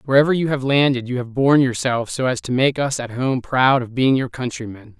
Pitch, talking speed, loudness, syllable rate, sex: 130 Hz, 240 wpm, -19 LUFS, 5.8 syllables/s, male